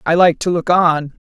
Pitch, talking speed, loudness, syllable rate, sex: 165 Hz, 235 wpm, -15 LUFS, 4.7 syllables/s, female